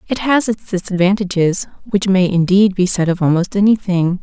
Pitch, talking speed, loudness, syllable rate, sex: 190 Hz, 170 wpm, -15 LUFS, 5.2 syllables/s, female